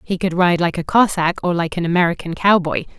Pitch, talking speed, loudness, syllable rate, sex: 175 Hz, 220 wpm, -17 LUFS, 5.8 syllables/s, female